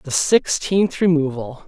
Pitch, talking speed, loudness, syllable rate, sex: 155 Hz, 105 wpm, -18 LUFS, 3.7 syllables/s, male